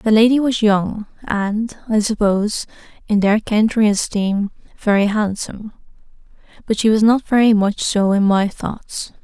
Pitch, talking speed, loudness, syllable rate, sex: 210 Hz, 150 wpm, -17 LUFS, 4.4 syllables/s, female